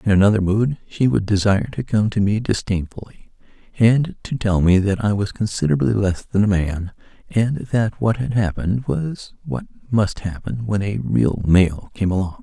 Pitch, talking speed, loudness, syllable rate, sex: 105 Hz, 185 wpm, -20 LUFS, 4.9 syllables/s, male